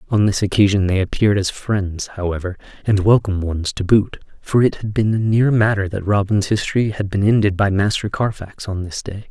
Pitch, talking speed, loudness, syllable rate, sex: 100 Hz, 200 wpm, -18 LUFS, 5.5 syllables/s, male